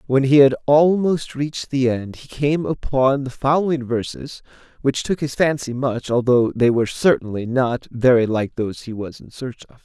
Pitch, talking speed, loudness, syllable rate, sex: 130 Hz, 190 wpm, -19 LUFS, 4.9 syllables/s, male